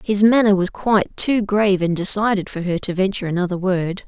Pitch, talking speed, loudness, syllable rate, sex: 195 Hz, 205 wpm, -18 LUFS, 5.8 syllables/s, female